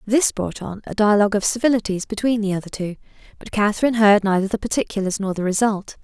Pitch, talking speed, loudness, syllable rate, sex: 210 Hz, 200 wpm, -20 LUFS, 6.5 syllables/s, female